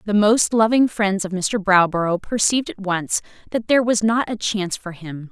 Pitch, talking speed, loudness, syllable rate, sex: 200 Hz, 205 wpm, -19 LUFS, 5.1 syllables/s, female